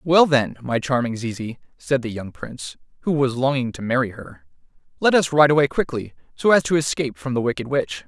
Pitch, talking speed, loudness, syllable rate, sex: 135 Hz, 210 wpm, -21 LUFS, 5.6 syllables/s, male